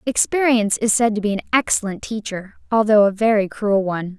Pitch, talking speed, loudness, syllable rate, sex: 215 Hz, 185 wpm, -18 LUFS, 5.7 syllables/s, female